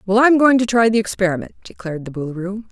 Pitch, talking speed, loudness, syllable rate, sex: 205 Hz, 220 wpm, -17 LUFS, 6.9 syllables/s, female